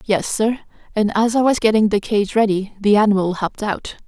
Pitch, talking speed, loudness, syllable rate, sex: 210 Hz, 205 wpm, -18 LUFS, 5.4 syllables/s, female